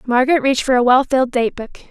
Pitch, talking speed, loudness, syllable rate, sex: 255 Hz, 250 wpm, -15 LUFS, 7.4 syllables/s, female